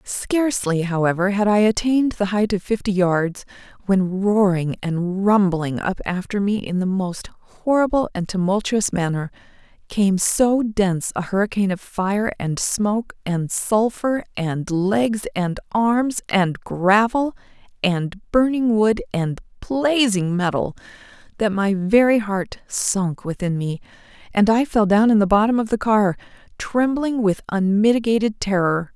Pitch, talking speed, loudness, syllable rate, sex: 205 Hz, 140 wpm, -20 LUFS, 4.1 syllables/s, female